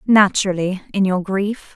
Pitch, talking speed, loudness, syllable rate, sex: 195 Hz, 105 wpm, -18 LUFS, 4.7 syllables/s, female